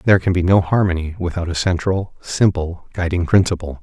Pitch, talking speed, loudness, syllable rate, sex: 90 Hz, 170 wpm, -18 LUFS, 5.7 syllables/s, male